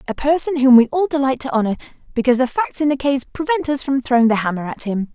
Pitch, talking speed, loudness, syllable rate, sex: 265 Hz, 255 wpm, -18 LUFS, 6.5 syllables/s, female